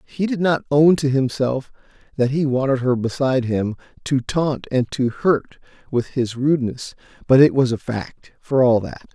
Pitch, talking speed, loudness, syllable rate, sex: 135 Hz, 185 wpm, -19 LUFS, 4.7 syllables/s, male